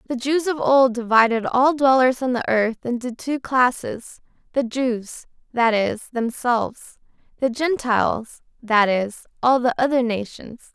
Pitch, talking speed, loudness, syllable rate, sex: 245 Hz, 135 wpm, -20 LUFS, 4.2 syllables/s, female